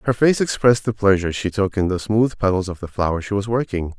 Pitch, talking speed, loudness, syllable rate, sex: 105 Hz, 255 wpm, -20 LUFS, 6.3 syllables/s, male